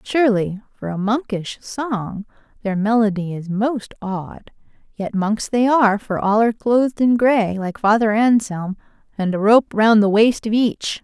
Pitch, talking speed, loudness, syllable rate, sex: 215 Hz, 170 wpm, -18 LUFS, 4.3 syllables/s, female